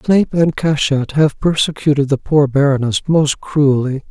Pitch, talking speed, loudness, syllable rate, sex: 145 Hz, 145 wpm, -15 LUFS, 4.6 syllables/s, male